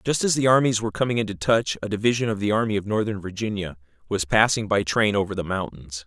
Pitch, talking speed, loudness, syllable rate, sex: 105 Hz, 230 wpm, -23 LUFS, 6.4 syllables/s, male